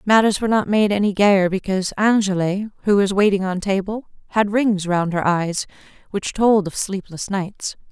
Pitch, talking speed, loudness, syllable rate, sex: 200 Hz, 175 wpm, -19 LUFS, 4.8 syllables/s, female